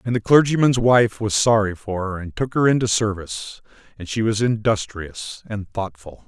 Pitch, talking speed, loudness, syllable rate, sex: 110 Hz, 180 wpm, -20 LUFS, 4.8 syllables/s, male